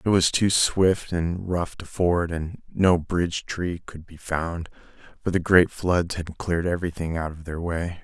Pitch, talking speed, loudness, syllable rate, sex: 85 Hz, 195 wpm, -24 LUFS, 4.3 syllables/s, male